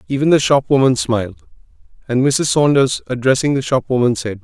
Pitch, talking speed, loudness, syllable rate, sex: 130 Hz, 150 wpm, -15 LUFS, 5.6 syllables/s, male